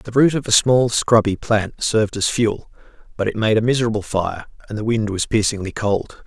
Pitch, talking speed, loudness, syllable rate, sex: 110 Hz, 210 wpm, -19 LUFS, 5.2 syllables/s, male